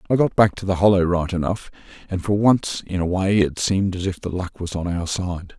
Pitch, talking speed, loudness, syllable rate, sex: 95 Hz, 260 wpm, -21 LUFS, 5.5 syllables/s, male